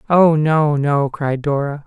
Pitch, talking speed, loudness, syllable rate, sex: 150 Hz, 160 wpm, -16 LUFS, 3.6 syllables/s, male